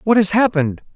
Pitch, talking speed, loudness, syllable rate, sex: 205 Hz, 190 wpm, -16 LUFS, 6.6 syllables/s, female